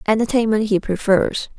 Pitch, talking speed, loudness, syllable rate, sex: 210 Hz, 115 wpm, -18 LUFS, 5.0 syllables/s, female